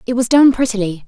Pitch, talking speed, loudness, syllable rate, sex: 230 Hz, 225 wpm, -14 LUFS, 6.5 syllables/s, female